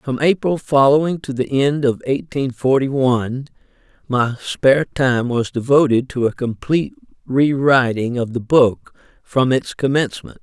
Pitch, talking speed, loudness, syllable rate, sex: 130 Hz, 145 wpm, -17 LUFS, 4.5 syllables/s, male